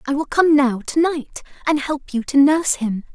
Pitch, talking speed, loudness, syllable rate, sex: 285 Hz, 230 wpm, -18 LUFS, 5.0 syllables/s, female